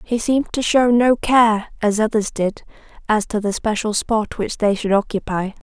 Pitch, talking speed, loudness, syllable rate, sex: 220 Hz, 190 wpm, -18 LUFS, 4.7 syllables/s, female